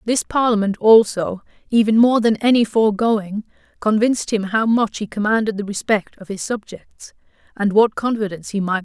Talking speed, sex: 185 wpm, female